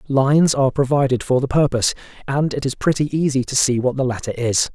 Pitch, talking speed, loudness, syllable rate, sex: 135 Hz, 215 wpm, -18 LUFS, 6.2 syllables/s, male